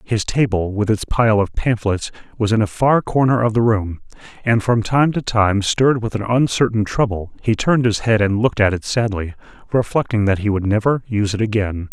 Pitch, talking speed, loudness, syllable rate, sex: 110 Hz, 210 wpm, -18 LUFS, 5.4 syllables/s, male